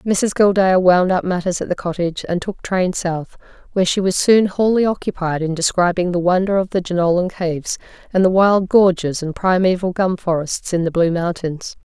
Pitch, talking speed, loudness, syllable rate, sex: 180 Hz, 190 wpm, -17 LUFS, 5.2 syllables/s, female